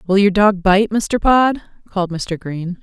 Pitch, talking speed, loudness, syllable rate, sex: 195 Hz, 190 wpm, -16 LUFS, 4.2 syllables/s, female